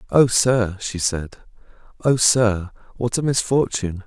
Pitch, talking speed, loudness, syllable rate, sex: 110 Hz, 135 wpm, -20 LUFS, 4.0 syllables/s, male